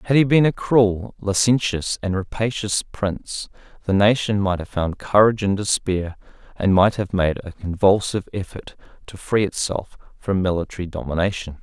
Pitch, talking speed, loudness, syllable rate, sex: 100 Hz, 155 wpm, -21 LUFS, 5.0 syllables/s, male